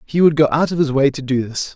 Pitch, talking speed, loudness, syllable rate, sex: 140 Hz, 340 wpm, -17 LUFS, 6.3 syllables/s, male